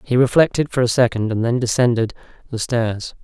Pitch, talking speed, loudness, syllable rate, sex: 120 Hz, 185 wpm, -18 LUFS, 5.5 syllables/s, male